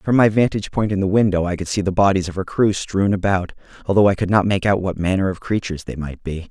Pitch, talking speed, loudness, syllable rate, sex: 95 Hz, 275 wpm, -19 LUFS, 6.3 syllables/s, male